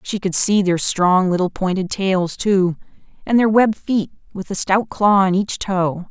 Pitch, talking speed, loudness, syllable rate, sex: 190 Hz, 195 wpm, -17 LUFS, 4.4 syllables/s, female